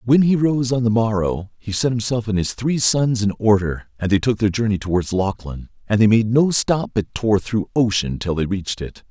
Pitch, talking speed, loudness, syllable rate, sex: 110 Hz, 230 wpm, -19 LUFS, 5.0 syllables/s, male